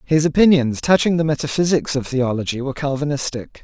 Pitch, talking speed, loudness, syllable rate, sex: 140 Hz, 150 wpm, -18 LUFS, 6.0 syllables/s, male